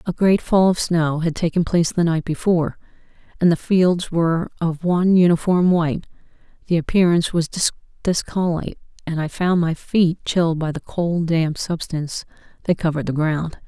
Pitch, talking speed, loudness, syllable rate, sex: 170 Hz, 165 wpm, -20 LUFS, 5.2 syllables/s, female